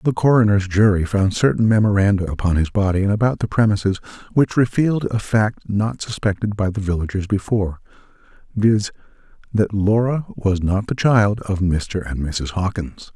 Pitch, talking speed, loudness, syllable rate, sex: 100 Hz, 160 wpm, -19 LUFS, 5.1 syllables/s, male